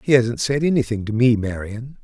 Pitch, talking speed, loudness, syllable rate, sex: 120 Hz, 205 wpm, -20 LUFS, 5.2 syllables/s, male